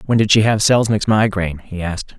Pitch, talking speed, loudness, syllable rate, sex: 105 Hz, 220 wpm, -16 LUFS, 5.9 syllables/s, male